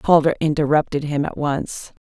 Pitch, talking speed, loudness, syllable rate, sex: 150 Hz, 150 wpm, -20 LUFS, 4.9 syllables/s, female